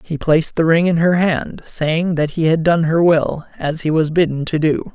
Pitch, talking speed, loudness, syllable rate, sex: 160 Hz, 245 wpm, -16 LUFS, 4.7 syllables/s, male